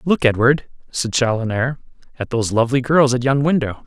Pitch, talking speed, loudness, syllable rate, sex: 125 Hz, 170 wpm, -18 LUFS, 5.7 syllables/s, male